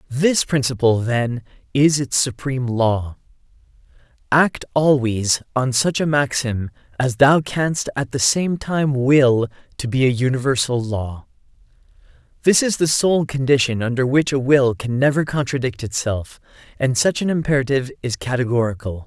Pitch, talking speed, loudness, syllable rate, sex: 130 Hz, 140 wpm, -19 LUFS, 4.6 syllables/s, male